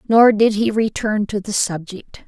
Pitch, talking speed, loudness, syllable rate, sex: 210 Hz, 185 wpm, -17 LUFS, 4.3 syllables/s, female